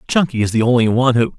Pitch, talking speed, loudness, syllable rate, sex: 120 Hz, 260 wpm, -15 LUFS, 7.4 syllables/s, male